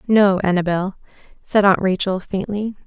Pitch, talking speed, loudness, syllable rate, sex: 195 Hz, 125 wpm, -19 LUFS, 4.6 syllables/s, female